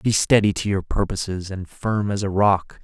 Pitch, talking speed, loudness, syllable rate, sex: 100 Hz, 210 wpm, -21 LUFS, 4.7 syllables/s, male